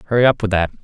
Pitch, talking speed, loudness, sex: 105 Hz, 285 wpm, -17 LUFS, male